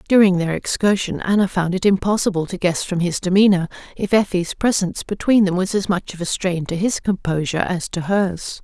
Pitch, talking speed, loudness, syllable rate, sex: 185 Hz, 200 wpm, -19 LUFS, 5.5 syllables/s, female